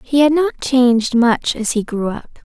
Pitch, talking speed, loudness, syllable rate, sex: 250 Hz, 215 wpm, -16 LUFS, 4.7 syllables/s, female